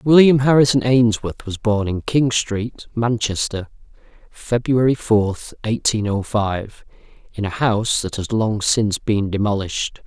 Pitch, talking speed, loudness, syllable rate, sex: 110 Hz, 135 wpm, -19 LUFS, 4.3 syllables/s, male